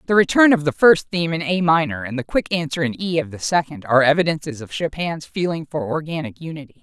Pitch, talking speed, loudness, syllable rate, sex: 155 Hz, 230 wpm, -19 LUFS, 6.2 syllables/s, female